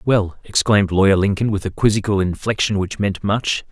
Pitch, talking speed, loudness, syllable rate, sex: 100 Hz, 180 wpm, -18 LUFS, 5.4 syllables/s, male